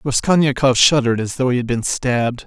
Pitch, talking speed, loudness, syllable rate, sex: 130 Hz, 195 wpm, -16 LUFS, 5.9 syllables/s, male